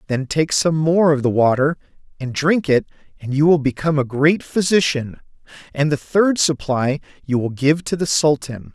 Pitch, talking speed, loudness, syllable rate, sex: 145 Hz, 185 wpm, -18 LUFS, 4.8 syllables/s, male